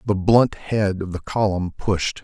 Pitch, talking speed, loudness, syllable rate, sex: 100 Hz, 190 wpm, -21 LUFS, 3.9 syllables/s, male